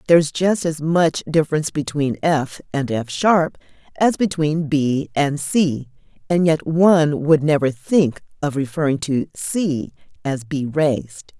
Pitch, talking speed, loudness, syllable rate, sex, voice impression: 150 Hz, 145 wpm, -19 LUFS, 4.1 syllables/s, female, very feminine, very middle-aged, thin, slightly relaxed, powerful, bright, soft, clear, fluent, slightly cute, cool, very intellectual, refreshing, very sincere, very calm, friendly, reassuring, very unique, slightly wild, sweet, lively, kind, modest